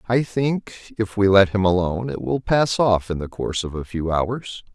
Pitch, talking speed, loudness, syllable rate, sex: 105 Hz, 225 wpm, -21 LUFS, 5.0 syllables/s, male